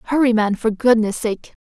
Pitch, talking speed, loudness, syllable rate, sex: 225 Hz, 185 wpm, -18 LUFS, 5.3 syllables/s, female